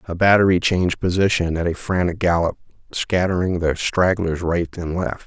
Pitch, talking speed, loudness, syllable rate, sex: 90 Hz, 160 wpm, -20 LUFS, 5.1 syllables/s, male